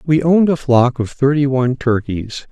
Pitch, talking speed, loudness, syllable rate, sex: 135 Hz, 190 wpm, -15 LUFS, 5.1 syllables/s, male